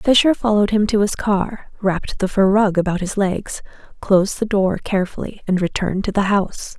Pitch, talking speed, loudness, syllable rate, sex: 200 Hz, 195 wpm, -18 LUFS, 5.5 syllables/s, female